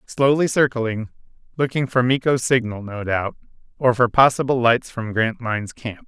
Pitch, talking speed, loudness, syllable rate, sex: 120 Hz, 150 wpm, -20 LUFS, 4.7 syllables/s, male